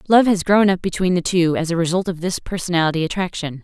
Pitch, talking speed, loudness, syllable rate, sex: 175 Hz, 230 wpm, -19 LUFS, 6.3 syllables/s, female